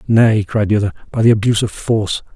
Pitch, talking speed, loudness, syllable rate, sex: 105 Hz, 230 wpm, -15 LUFS, 6.8 syllables/s, male